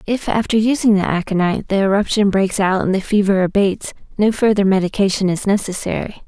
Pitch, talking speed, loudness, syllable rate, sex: 200 Hz, 170 wpm, -17 LUFS, 5.9 syllables/s, female